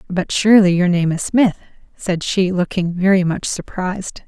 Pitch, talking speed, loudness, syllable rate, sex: 185 Hz, 170 wpm, -17 LUFS, 4.9 syllables/s, female